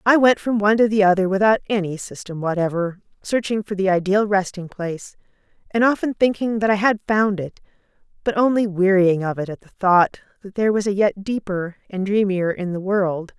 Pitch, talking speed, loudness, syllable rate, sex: 195 Hz, 195 wpm, -20 LUFS, 5.5 syllables/s, female